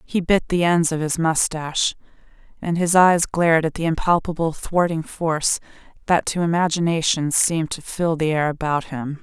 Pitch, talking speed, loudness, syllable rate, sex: 165 Hz, 170 wpm, -20 LUFS, 5.0 syllables/s, female